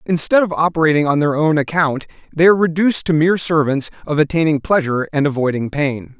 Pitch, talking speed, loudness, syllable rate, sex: 155 Hz, 185 wpm, -16 LUFS, 6.2 syllables/s, male